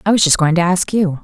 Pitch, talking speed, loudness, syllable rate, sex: 180 Hz, 340 wpm, -14 LUFS, 6.3 syllables/s, female